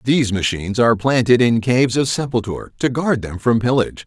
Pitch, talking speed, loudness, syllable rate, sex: 120 Hz, 190 wpm, -17 LUFS, 6.2 syllables/s, male